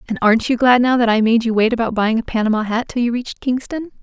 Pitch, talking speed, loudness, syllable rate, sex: 235 Hz, 285 wpm, -17 LUFS, 6.7 syllables/s, female